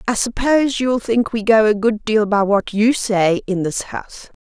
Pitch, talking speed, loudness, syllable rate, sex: 220 Hz, 215 wpm, -17 LUFS, 4.6 syllables/s, female